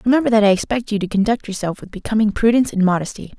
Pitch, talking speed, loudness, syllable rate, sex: 215 Hz, 230 wpm, -18 LUFS, 7.4 syllables/s, female